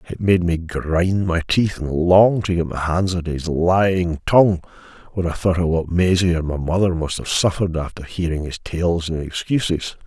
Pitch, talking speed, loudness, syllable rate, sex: 85 Hz, 205 wpm, -19 LUFS, 4.8 syllables/s, male